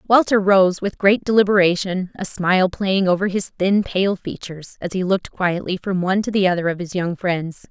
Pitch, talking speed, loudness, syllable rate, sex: 190 Hz, 200 wpm, -19 LUFS, 5.2 syllables/s, female